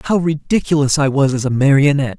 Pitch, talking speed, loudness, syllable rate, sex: 140 Hz, 190 wpm, -15 LUFS, 6.5 syllables/s, male